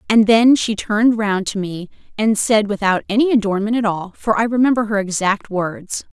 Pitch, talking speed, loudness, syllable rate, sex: 210 Hz, 195 wpm, -17 LUFS, 5.1 syllables/s, female